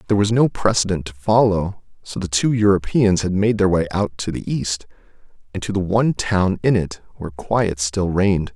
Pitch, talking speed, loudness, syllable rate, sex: 95 Hz, 205 wpm, -19 LUFS, 5.2 syllables/s, male